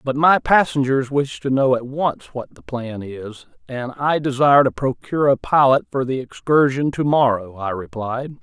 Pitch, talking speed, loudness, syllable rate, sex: 130 Hz, 185 wpm, -19 LUFS, 4.7 syllables/s, male